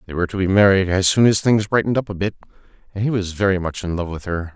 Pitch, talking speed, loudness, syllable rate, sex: 95 Hz, 290 wpm, -19 LUFS, 7.1 syllables/s, male